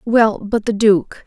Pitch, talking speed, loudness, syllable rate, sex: 215 Hz, 190 wpm, -16 LUFS, 3.4 syllables/s, female